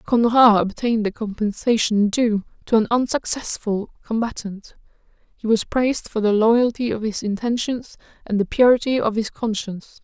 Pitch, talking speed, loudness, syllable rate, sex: 220 Hz, 145 wpm, -20 LUFS, 4.9 syllables/s, female